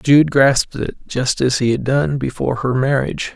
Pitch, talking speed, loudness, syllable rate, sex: 135 Hz, 180 wpm, -17 LUFS, 5.0 syllables/s, male